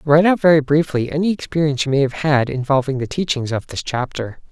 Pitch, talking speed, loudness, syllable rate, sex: 145 Hz, 215 wpm, -18 LUFS, 6.2 syllables/s, male